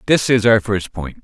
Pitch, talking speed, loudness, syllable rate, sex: 110 Hz, 245 wpm, -16 LUFS, 4.7 syllables/s, male